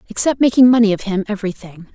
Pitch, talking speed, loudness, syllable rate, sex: 215 Hz, 155 wpm, -15 LUFS, 6.9 syllables/s, female